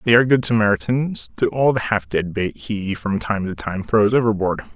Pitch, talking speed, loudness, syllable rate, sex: 105 Hz, 215 wpm, -20 LUFS, 5.2 syllables/s, male